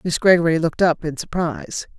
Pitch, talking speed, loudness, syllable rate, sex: 165 Hz, 180 wpm, -19 LUFS, 6.0 syllables/s, female